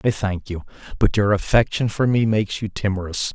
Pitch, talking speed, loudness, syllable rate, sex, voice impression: 105 Hz, 200 wpm, -21 LUFS, 5.5 syllables/s, male, masculine, middle-aged, powerful, slightly hard, slightly muffled, slightly halting, slightly sincere, slightly mature, wild, kind, modest